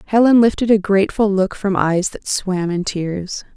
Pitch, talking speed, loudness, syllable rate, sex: 195 Hz, 185 wpm, -17 LUFS, 4.6 syllables/s, female